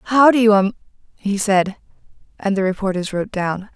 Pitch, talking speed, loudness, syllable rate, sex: 205 Hz, 160 wpm, -18 LUFS, 5.2 syllables/s, female